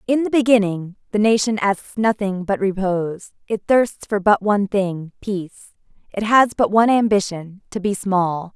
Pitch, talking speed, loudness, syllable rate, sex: 200 Hz, 170 wpm, -19 LUFS, 4.9 syllables/s, female